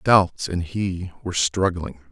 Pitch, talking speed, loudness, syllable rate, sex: 90 Hz, 140 wpm, -23 LUFS, 3.9 syllables/s, male